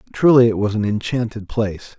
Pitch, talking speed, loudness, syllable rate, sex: 110 Hz, 180 wpm, -18 LUFS, 5.8 syllables/s, male